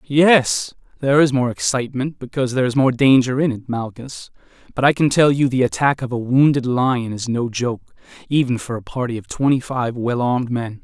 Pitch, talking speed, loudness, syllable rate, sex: 130 Hz, 205 wpm, -18 LUFS, 5.4 syllables/s, male